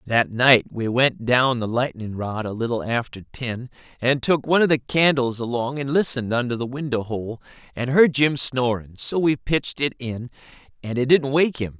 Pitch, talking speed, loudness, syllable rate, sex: 125 Hz, 200 wpm, -21 LUFS, 4.9 syllables/s, male